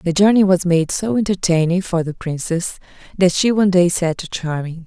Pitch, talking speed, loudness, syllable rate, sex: 175 Hz, 195 wpm, -17 LUFS, 5.3 syllables/s, female